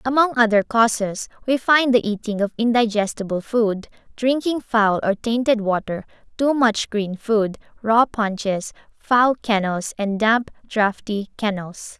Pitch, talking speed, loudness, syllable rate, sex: 220 Hz, 135 wpm, -20 LUFS, 4.1 syllables/s, female